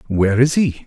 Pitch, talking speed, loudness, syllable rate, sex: 125 Hz, 210 wpm, -16 LUFS, 5.8 syllables/s, male